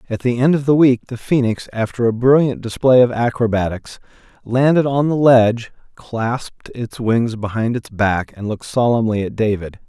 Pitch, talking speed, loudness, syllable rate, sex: 120 Hz, 175 wpm, -17 LUFS, 5.0 syllables/s, male